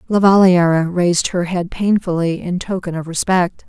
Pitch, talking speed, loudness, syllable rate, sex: 180 Hz, 165 wpm, -16 LUFS, 4.9 syllables/s, female